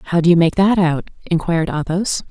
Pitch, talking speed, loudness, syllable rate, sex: 170 Hz, 210 wpm, -17 LUFS, 5.9 syllables/s, female